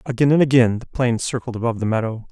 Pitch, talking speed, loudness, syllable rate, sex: 120 Hz, 235 wpm, -19 LUFS, 7.4 syllables/s, male